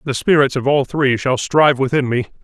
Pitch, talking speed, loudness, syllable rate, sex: 135 Hz, 220 wpm, -16 LUFS, 5.6 syllables/s, male